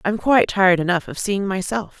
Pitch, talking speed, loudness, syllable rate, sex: 195 Hz, 240 wpm, -19 LUFS, 6.4 syllables/s, female